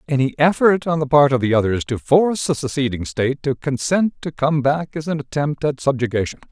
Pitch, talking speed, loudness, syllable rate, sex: 140 Hz, 210 wpm, -19 LUFS, 5.7 syllables/s, male